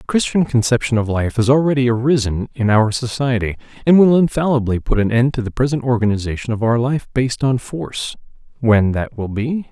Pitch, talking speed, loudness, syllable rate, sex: 125 Hz, 185 wpm, -17 LUFS, 5.7 syllables/s, male